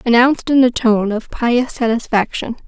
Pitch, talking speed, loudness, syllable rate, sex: 235 Hz, 155 wpm, -16 LUFS, 4.8 syllables/s, female